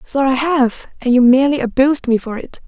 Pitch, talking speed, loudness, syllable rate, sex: 265 Hz, 225 wpm, -15 LUFS, 5.8 syllables/s, female